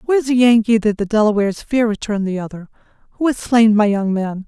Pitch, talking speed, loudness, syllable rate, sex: 220 Hz, 230 wpm, -16 LUFS, 6.4 syllables/s, female